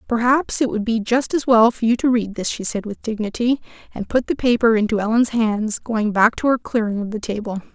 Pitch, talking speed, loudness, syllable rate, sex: 225 Hz, 240 wpm, -19 LUFS, 5.4 syllables/s, female